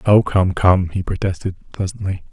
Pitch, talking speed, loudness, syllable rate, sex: 95 Hz, 155 wpm, -19 LUFS, 5.0 syllables/s, male